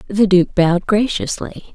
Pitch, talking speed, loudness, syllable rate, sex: 190 Hz, 135 wpm, -16 LUFS, 4.7 syllables/s, female